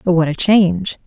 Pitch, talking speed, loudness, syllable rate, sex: 180 Hz, 225 wpm, -15 LUFS, 5.4 syllables/s, female